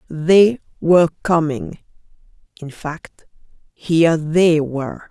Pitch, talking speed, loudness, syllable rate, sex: 160 Hz, 80 wpm, -17 LUFS, 3.6 syllables/s, female